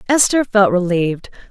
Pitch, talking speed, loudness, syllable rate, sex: 205 Hz, 120 wpm, -15 LUFS, 5.2 syllables/s, female